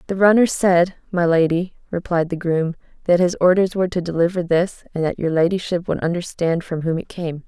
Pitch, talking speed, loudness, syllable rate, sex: 175 Hz, 200 wpm, -19 LUFS, 5.5 syllables/s, female